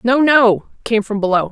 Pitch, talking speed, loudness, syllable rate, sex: 225 Hz, 200 wpm, -15 LUFS, 4.7 syllables/s, female